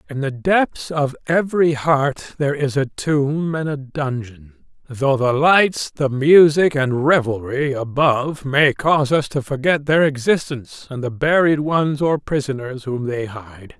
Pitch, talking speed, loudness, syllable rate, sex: 140 Hz, 160 wpm, -18 LUFS, 4.2 syllables/s, male